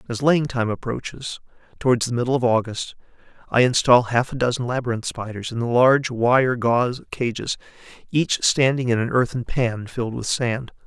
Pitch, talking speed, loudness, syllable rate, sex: 120 Hz, 165 wpm, -21 LUFS, 5.1 syllables/s, male